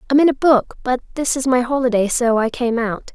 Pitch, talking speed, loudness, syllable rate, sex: 250 Hz, 250 wpm, -18 LUFS, 5.5 syllables/s, female